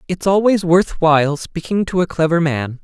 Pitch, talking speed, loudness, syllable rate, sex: 170 Hz, 190 wpm, -16 LUFS, 4.9 syllables/s, male